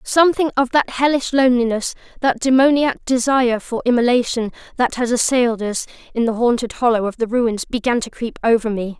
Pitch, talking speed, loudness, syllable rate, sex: 245 Hz, 175 wpm, -18 LUFS, 5.7 syllables/s, female